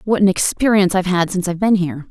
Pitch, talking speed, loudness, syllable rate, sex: 190 Hz, 315 wpm, -16 LUFS, 8.1 syllables/s, female